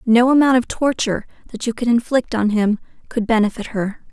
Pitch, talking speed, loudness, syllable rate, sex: 230 Hz, 190 wpm, -18 LUFS, 5.5 syllables/s, female